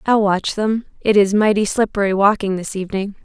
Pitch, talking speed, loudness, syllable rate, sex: 205 Hz, 185 wpm, -17 LUFS, 5.5 syllables/s, female